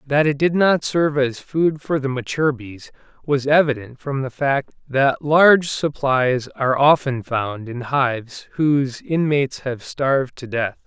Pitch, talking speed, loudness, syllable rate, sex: 140 Hz, 165 wpm, -19 LUFS, 4.3 syllables/s, male